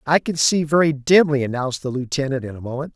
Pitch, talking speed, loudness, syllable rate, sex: 140 Hz, 225 wpm, -19 LUFS, 6.4 syllables/s, male